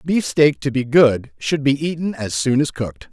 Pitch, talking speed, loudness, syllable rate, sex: 135 Hz, 230 wpm, -18 LUFS, 4.7 syllables/s, male